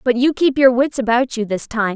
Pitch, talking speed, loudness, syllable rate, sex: 245 Hz, 275 wpm, -16 LUFS, 5.3 syllables/s, female